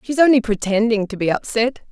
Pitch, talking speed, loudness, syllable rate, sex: 230 Hz, 190 wpm, -18 LUFS, 5.8 syllables/s, female